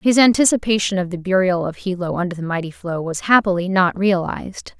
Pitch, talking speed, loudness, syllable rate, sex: 190 Hz, 190 wpm, -18 LUFS, 5.7 syllables/s, female